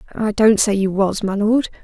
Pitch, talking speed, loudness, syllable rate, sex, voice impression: 210 Hz, 230 wpm, -17 LUFS, 4.9 syllables/s, female, feminine, adult-like, relaxed, bright, soft, fluent, raspy, friendly, reassuring, elegant, lively, kind, slightly light